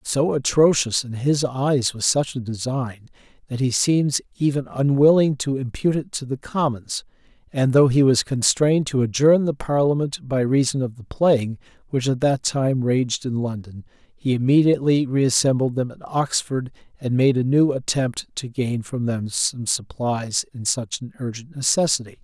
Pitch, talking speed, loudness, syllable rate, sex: 130 Hz, 170 wpm, -21 LUFS, 4.6 syllables/s, male